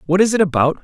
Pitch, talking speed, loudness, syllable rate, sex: 175 Hz, 285 wpm, -15 LUFS, 7.3 syllables/s, male